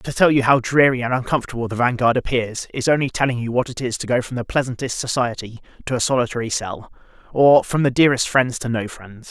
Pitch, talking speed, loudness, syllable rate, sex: 125 Hz, 225 wpm, -19 LUFS, 6.2 syllables/s, male